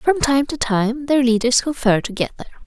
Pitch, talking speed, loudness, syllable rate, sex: 255 Hz, 180 wpm, -18 LUFS, 5.6 syllables/s, female